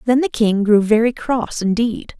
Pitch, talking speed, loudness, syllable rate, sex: 225 Hz, 190 wpm, -17 LUFS, 4.4 syllables/s, female